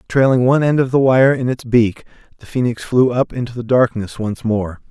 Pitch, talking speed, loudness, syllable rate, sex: 120 Hz, 220 wpm, -16 LUFS, 5.3 syllables/s, male